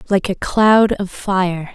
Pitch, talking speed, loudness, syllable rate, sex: 195 Hz, 170 wpm, -16 LUFS, 3.2 syllables/s, female